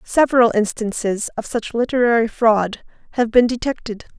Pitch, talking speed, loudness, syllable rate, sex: 230 Hz, 130 wpm, -18 LUFS, 5.0 syllables/s, female